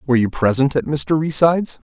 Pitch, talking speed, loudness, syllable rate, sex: 130 Hz, 190 wpm, -17 LUFS, 5.6 syllables/s, male